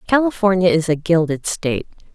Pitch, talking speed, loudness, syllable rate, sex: 175 Hz, 140 wpm, -18 LUFS, 5.7 syllables/s, female